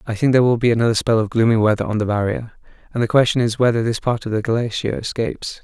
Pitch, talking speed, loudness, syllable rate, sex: 115 Hz, 255 wpm, -18 LUFS, 6.8 syllables/s, male